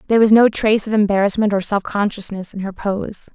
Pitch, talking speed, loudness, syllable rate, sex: 205 Hz, 215 wpm, -17 LUFS, 6.2 syllables/s, female